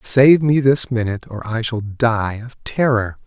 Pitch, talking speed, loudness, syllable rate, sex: 120 Hz, 185 wpm, -17 LUFS, 4.2 syllables/s, male